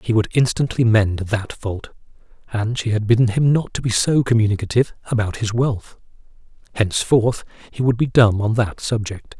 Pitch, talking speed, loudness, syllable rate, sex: 110 Hz, 170 wpm, -19 LUFS, 5.2 syllables/s, male